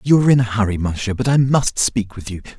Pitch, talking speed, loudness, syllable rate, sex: 115 Hz, 280 wpm, -17 LUFS, 6.4 syllables/s, male